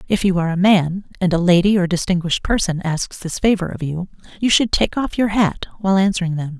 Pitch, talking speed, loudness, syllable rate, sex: 185 Hz, 225 wpm, -18 LUFS, 6.0 syllables/s, female